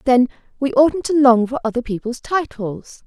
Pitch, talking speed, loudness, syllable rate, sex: 255 Hz, 175 wpm, -18 LUFS, 4.7 syllables/s, female